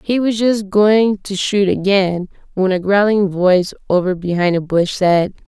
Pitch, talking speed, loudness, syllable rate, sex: 195 Hz, 170 wpm, -15 LUFS, 4.3 syllables/s, female